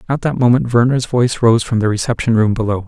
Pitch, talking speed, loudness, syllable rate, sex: 120 Hz, 230 wpm, -15 LUFS, 6.3 syllables/s, male